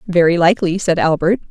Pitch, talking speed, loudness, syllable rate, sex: 175 Hz, 160 wpm, -15 LUFS, 6.3 syllables/s, female